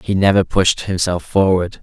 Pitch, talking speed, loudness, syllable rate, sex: 95 Hz, 165 wpm, -16 LUFS, 4.5 syllables/s, male